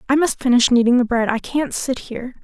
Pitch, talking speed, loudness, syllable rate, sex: 250 Hz, 245 wpm, -18 LUFS, 5.9 syllables/s, female